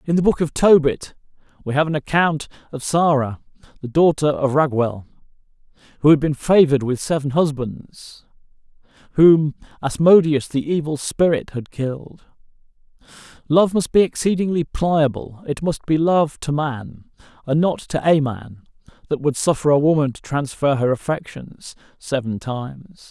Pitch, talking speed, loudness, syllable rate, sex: 150 Hz, 145 wpm, -19 LUFS, 4.7 syllables/s, male